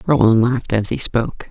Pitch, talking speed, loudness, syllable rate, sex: 115 Hz, 200 wpm, -17 LUFS, 5.8 syllables/s, female